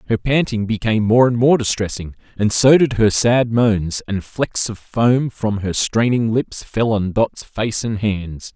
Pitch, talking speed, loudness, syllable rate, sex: 110 Hz, 190 wpm, -17 LUFS, 4.1 syllables/s, male